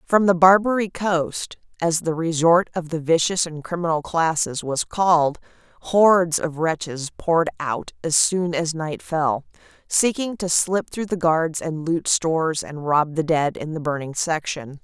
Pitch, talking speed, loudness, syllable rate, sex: 165 Hz, 170 wpm, -21 LUFS, 4.3 syllables/s, female